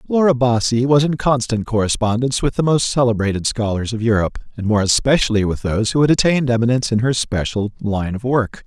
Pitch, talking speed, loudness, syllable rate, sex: 120 Hz, 195 wpm, -17 LUFS, 6.2 syllables/s, male